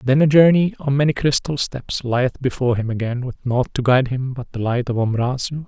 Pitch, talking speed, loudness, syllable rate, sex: 130 Hz, 220 wpm, -19 LUFS, 5.5 syllables/s, male